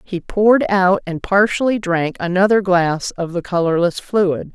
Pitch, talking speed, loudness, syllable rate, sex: 185 Hz, 160 wpm, -17 LUFS, 4.4 syllables/s, female